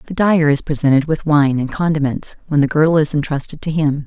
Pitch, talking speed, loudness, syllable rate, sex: 150 Hz, 220 wpm, -16 LUFS, 5.8 syllables/s, female